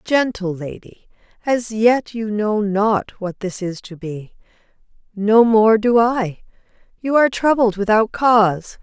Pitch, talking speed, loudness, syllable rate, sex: 215 Hz, 145 wpm, -17 LUFS, 3.9 syllables/s, female